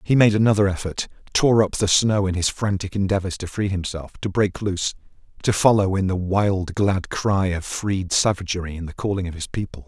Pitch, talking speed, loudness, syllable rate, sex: 95 Hz, 205 wpm, -21 LUFS, 5.3 syllables/s, male